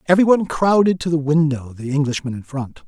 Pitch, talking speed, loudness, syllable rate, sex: 150 Hz, 190 wpm, -18 LUFS, 6.0 syllables/s, male